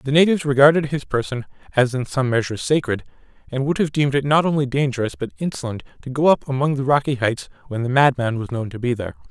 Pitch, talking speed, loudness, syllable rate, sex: 135 Hz, 225 wpm, -20 LUFS, 6.6 syllables/s, male